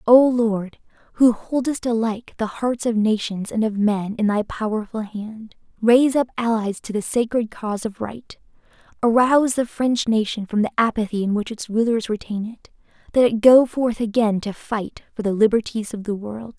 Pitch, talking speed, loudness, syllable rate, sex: 225 Hz, 185 wpm, -21 LUFS, 4.9 syllables/s, female